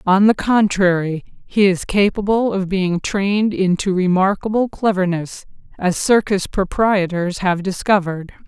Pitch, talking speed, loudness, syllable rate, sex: 190 Hz, 120 wpm, -17 LUFS, 4.4 syllables/s, female